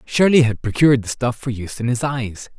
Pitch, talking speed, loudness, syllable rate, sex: 120 Hz, 230 wpm, -18 LUFS, 5.8 syllables/s, male